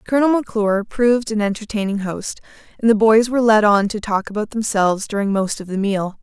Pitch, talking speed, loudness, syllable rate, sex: 210 Hz, 200 wpm, -18 LUFS, 6.1 syllables/s, female